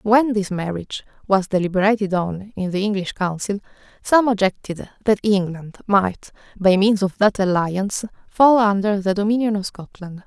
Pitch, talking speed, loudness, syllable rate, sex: 200 Hz, 150 wpm, -19 LUFS, 4.9 syllables/s, female